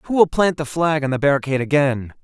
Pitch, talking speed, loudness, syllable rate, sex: 145 Hz, 240 wpm, -18 LUFS, 6.1 syllables/s, male